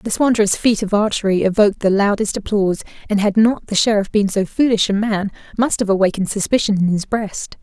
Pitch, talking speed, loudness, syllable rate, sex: 205 Hz, 205 wpm, -17 LUFS, 5.9 syllables/s, female